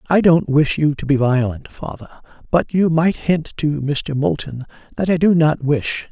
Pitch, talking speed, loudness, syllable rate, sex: 150 Hz, 195 wpm, -17 LUFS, 4.4 syllables/s, male